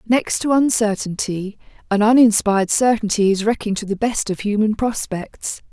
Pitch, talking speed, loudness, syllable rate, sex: 215 Hz, 145 wpm, -18 LUFS, 4.8 syllables/s, female